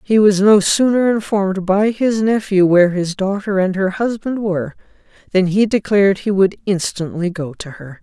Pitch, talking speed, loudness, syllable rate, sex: 195 Hz, 180 wpm, -16 LUFS, 5.0 syllables/s, female